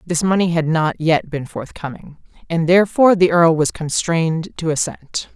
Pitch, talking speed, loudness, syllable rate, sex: 165 Hz, 170 wpm, -17 LUFS, 5.0 syllables/s, female